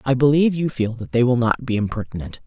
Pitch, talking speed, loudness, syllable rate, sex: 125 Hz, 245 wpm, -20 LUFS, 6.4 syllables/s, female